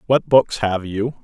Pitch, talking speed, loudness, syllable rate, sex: 110 Hz, 195 wpm, -18 LUFS, 3.9 syllables/s, male